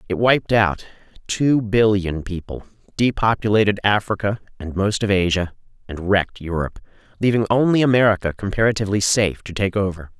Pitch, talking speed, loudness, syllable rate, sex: 100 Hz, 135 wpm, -19 LUFS, 5.7 syllables/s, male